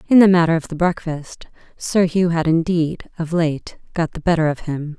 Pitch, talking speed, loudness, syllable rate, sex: 165 Hz, 205 wpm, -19 LUFS, 4.8 syllables/s, female